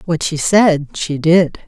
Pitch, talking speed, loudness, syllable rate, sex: 165 Hz, 180 wpm, -14 LUFS, 3.4 syllables/s, female